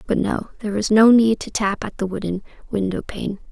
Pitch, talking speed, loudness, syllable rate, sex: 210 Hz, 205 wpm, -20 LUFS, 5.5 syllables/s, female